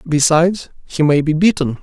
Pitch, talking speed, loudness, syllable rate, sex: 160 Hz, 165 wpm, -14 LUFS, 5.3 syllables/s, male